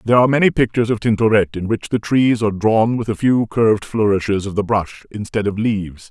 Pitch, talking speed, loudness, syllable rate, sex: 110 Hz, 225 wpm, -17 LUFS, 6.1 syllables/s, male